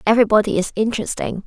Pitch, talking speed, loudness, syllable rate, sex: 215 Hz, 125 wpm, -18 LUFS, 7.6 syllables/s, female